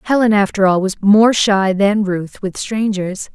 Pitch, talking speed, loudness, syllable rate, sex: 200 Hz, 180 wpm, -15 LUFS, 4.2 syllables/s, female